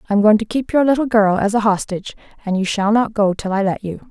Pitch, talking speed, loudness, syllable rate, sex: 210 Hz, 280 wpm, -17 LUFS, 6.1 syllables/s, female